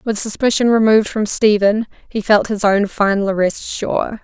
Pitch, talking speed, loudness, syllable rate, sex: 210 Hz, 170 wpm, -16 LUFS, 4.9 syllables/s, female